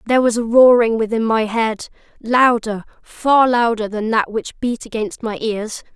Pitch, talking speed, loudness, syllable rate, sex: 230 Hz, 160 wpm, -17 LUFS, 4.5 syllables/s, female